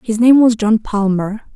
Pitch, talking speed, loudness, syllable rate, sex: 220 Hz, 195 wpm, -13 LUFS, 4.5 syllables/s, female